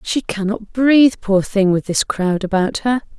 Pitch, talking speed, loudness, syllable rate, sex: 210 Hz, 190 wpm, -17 LUFS, 4.5 syllables/s, female